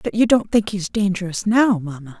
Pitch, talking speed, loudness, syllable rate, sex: 195 Hz, 245 wpm, -19 LUFS, 5.7 syllables/s, female